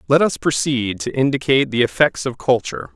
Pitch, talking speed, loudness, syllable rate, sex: 130 Hz, 185 wpm, -18 LUFS, 5.8 syllables/s, male